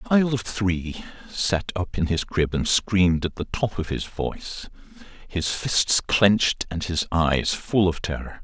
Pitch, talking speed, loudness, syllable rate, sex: 90 Hz, 185 wpm, -23 LUFS, 4.1 syllables/s, male